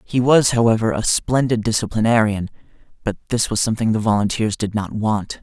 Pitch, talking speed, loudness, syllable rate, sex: 110 Hz, 165 wpm, -19 LUFS, 5.6 syllables/s, male